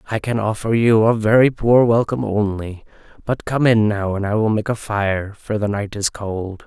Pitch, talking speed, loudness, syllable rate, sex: 110 Hz, 215 wpm, -18 LUFS, 4.8 syllables/s, male